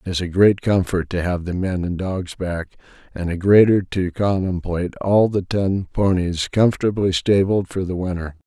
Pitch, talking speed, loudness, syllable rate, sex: 95 Hz, 185 wpm, -20 LUFS, 4.8 syllables/s, male